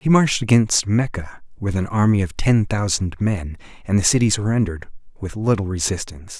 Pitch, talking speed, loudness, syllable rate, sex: 105 Hz, 170 wpm, -19 LUFS, 5.5 syllables/s, male